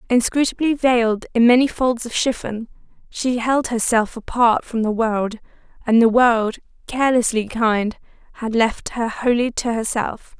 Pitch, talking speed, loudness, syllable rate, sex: 235 Hz, 145 wpm, -19 LUFS, 4.4 syllables/s, female